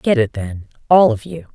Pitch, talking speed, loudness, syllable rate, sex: 175 Hz, 195 wpm, -16 LUFS, 4.7 syllables/s, female